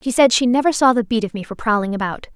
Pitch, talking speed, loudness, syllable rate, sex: 230 Hz, 305 wpm, -18 LUFS, 6.8 syllables/s, female